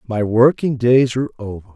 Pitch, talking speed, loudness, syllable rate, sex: 120 Hz, 170 wpm, -16 LUFS, 5.5 syllables/s, male